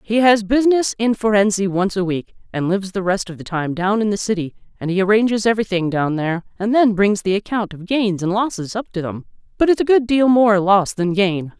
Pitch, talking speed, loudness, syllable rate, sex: 200 Hz, 240 wpm, -18 LUFS, 5.7 syllables/s, female